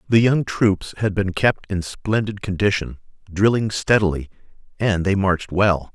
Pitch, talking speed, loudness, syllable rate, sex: 100 Hz, 150 wpm, -20 LUFS, 4.6 syllables/s, male